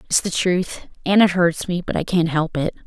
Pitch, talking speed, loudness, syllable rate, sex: 175 Hz, 250 wpm, -20 LUFS, 5.0 syllables/s, female